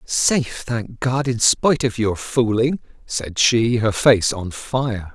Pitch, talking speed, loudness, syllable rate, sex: 120 Hz, 165 wpm, -19 LUFS, 3.6 syllables/s, male